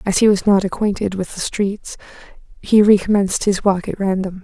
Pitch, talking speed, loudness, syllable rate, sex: 195 Hz, 190 wpm, -17 LUFS, 5.4 syllables/s, female